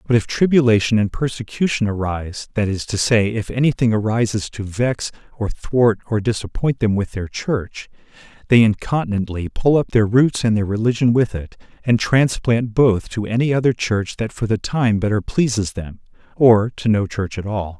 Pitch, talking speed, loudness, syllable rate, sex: 110 Hz, 180 wpm, -19 LUFS, 5.0 syllables/s, male